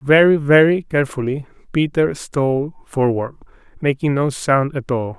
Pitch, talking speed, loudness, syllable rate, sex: 140 Hz, 125 wpm, -18 LUFS, 4.6 syllables/s, male